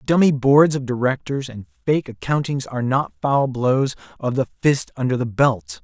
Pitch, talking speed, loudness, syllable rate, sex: 130 Hz, 175 wpm, -20 LUFS, 4.7 syllables/s, male